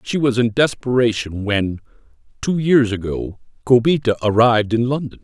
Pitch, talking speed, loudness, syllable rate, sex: 120 Hz, 140 wpm, -18 LUFS, 5.0 syllables/s, male